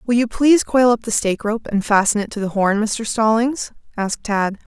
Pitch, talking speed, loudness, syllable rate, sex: 220 Hz, 225 wpm, -18 LUFS, 5.4 syllables/s, female